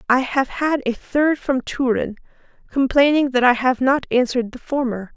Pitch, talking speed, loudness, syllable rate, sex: 260 Hz, 175 wpm, -19 LUFS, 4.8 syllables/s, female